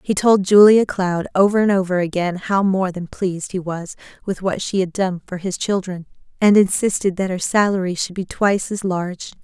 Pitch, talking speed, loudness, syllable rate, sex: 190 Hz, 205 wpm, -18 LUFS, 5.2 syllables/s, female